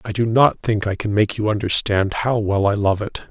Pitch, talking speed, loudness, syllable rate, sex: 105 Hz, 255 wpm, -19 LUFS, 5.1 syllables/s, male